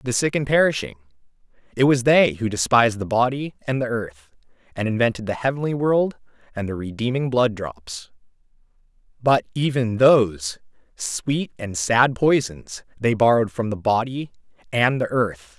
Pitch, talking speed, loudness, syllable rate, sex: 120 Hz, 145 wpm, -21 LUFS, 4.8 syllables/s, male